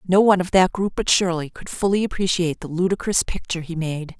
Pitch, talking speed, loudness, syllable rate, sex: 180 Hz, 215 wpm, -21 LUFS, 6.3 syllables/s, female